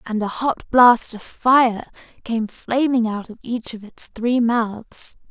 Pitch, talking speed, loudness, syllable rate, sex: 230 Hz, 170 wpm, -19 LUFS, 3.4 syllables/s, female